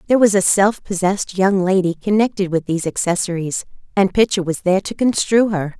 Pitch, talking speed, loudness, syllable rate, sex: 190 Hz, 185 wpm, -17 LUFS, 5.9 syllables/s, female